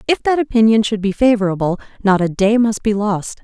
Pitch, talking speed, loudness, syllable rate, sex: 215 Hz, 210 wpm, -16 LUFS, 5.6 syllables/s, female